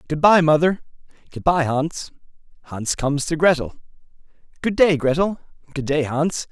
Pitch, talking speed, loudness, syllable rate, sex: 155 Hz, 130 wpm, -19 LUFS, 4.9 syllables/s, male